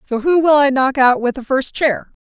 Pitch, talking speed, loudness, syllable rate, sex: 270 Hz, 265 wpm, -15 LUFS, 5.0 syllables/s, female